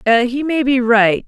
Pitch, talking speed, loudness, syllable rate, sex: 250 Hz, 190 wpm, -14 LUFS, 3.5 syllables/s, female